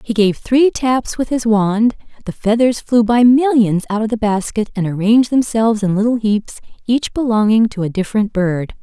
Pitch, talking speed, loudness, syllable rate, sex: 220 Hz, 185 wpm, -15 LUFS, 5.0 syllables/s, female